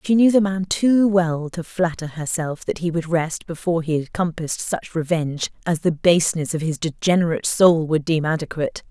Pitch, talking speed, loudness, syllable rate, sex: 170 Hz, 195 wpm, -21 LUFS, 5.3 syllables/s, female